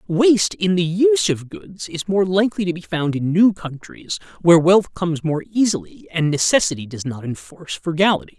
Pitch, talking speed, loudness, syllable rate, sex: 175 Hz, 185 wpm, -19 LUFS, 5.4 syllables/s, male